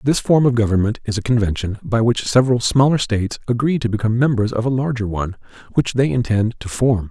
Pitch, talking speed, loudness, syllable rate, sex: 115 Hz, 210 wpm, -18 LUFS, 6.2 syllables/s, male